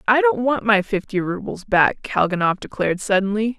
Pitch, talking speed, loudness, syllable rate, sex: 215 Hz, 165 wpm, -20 LUFS, 5.2 syllables/s, female